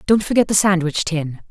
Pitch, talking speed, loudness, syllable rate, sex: 180 Hz, 200 wpm, -17 LUFS, 5.3 syllables/s, female